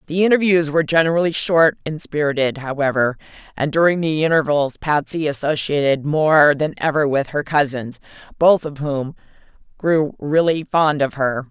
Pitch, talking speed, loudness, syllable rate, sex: 150 Hz, 145 wpm, -18 LUFS, 4.9 syllables/s, female